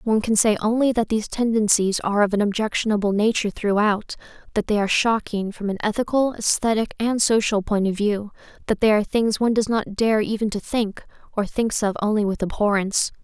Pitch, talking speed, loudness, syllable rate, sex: 215 Hz, 195 wpm, -21 LUFS, 5.9 syllables/s, female